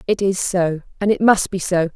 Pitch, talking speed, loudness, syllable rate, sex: 185 Hz, 245 wpm, -18 LUFS, 5.0 syllables/s, female